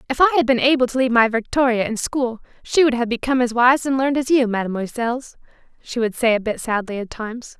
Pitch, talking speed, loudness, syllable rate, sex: 245 Hz, 235 wpm, -19 LUFS, 6.5 syllables/s, female